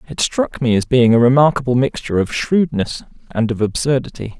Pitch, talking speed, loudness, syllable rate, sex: 125 Hz, 175 wpm, -16 LUFS, 5.6 syllables/s, male